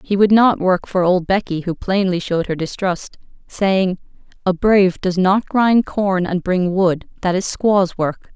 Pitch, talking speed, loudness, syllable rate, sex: 190 Hz, 170 wpm, -17 LUFS, 4.3 syllables/s, female